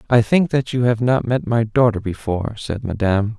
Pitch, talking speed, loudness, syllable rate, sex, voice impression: 115 Hz, 210 wpm, -19 LUFS, 5.4 syllables/s, male, very masculine, adult-like, cool, slightly intellectual, sincere, calm